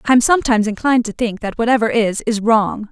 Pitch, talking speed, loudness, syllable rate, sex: 225 Hz, 205 wpm, -16 LUFS, 6.1 syllables/s, female